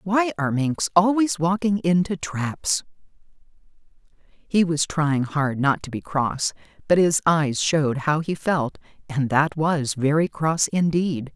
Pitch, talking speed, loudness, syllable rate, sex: 160 Hz, 150 wpm, -22 LUFS, 3.9 syllables/s, female